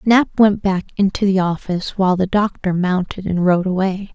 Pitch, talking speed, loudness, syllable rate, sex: 190 Hz, 190 wpm, -17 LUFS, 5.2 syllables/s, female